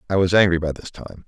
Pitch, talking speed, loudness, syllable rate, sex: 90 Hz, 280 wpm, -18 LUFS, 6.5 syllables/s, male